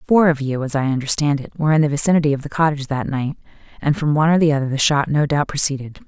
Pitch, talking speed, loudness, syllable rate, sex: 145 Hz, 265 wpm, -18 LUFS, 7.2 syllables/s, female